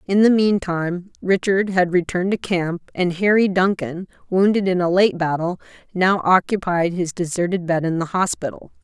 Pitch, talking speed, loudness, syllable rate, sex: 180 Hz, 165 wpm, -19 LUFS, 4.9 syllables/s, female